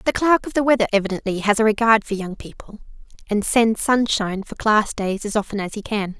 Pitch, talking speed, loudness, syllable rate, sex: 215 Hz, 225 wpm, -20 LUFS, 5.8 syllables/s, female